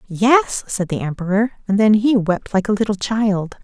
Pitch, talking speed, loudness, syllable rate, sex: 205 Hz, 200 wpm, -18 LUFS, 4.6 syllables/s, female